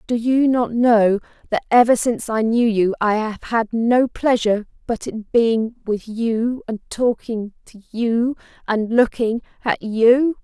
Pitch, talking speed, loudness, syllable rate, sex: 230 Hz, 160 wpm, -19 LUFS, 4.0 syllables/s, female